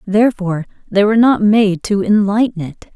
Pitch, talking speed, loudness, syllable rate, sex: 205 Hz, 165 wpm, -14 LUFS, 5.4 syllables/s, female